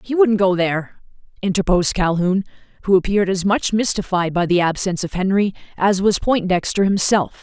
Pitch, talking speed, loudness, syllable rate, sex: 190 Hz, 160 wpm, -18 LUFS, 5.7 syllables/s, female